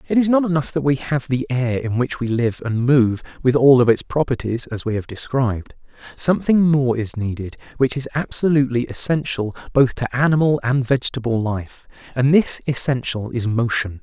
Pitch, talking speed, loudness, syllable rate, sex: 130 Hz, 180 wpm, -19 LUFS, 5.2 syllables/s, male